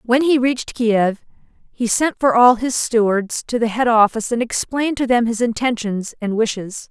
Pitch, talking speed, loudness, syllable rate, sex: 235 Hz, 190 wpm, -18 LUFS, 4.9 syllables/s, female